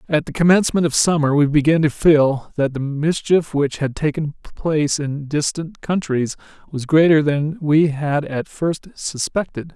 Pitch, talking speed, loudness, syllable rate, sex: 150 Hz, 165 wpm, -18 LUFS, 4.4 syllables/s, male